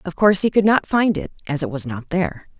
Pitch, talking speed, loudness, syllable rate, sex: 175 Hz, 280 wpm, -19 LUFS, 6.4 syllables/s, female